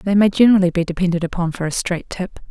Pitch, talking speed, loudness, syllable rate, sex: 180 Hz, 240 wpm, -18 LUFS, 6.9 syllables/s, female